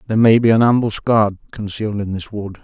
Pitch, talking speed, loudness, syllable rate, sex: 105 Hz, 205 wpm, -16 LUFS, 6.2 syllables/s, male